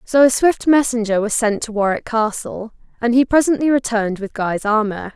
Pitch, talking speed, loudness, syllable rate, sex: 230 Hz, 185 wpm, -17 LUFS, 5.2 syllables/s, female